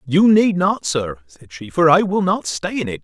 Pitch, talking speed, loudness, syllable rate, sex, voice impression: 160 Hz, 255 wpm, -17 LUFS, 4.7 syllables/s, male, masculine, adult-like, slightly clear, slightly refreshing, friendly, slightly lively